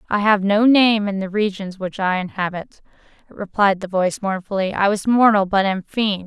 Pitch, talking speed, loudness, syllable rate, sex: 200 Hz, 190 wpm, -18 LUFS, 5.0 syllables/s, female